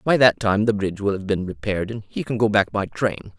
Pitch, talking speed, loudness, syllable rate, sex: 105 Hz, 285 wpm, -22 LUFS, 6.2 syllables/s, male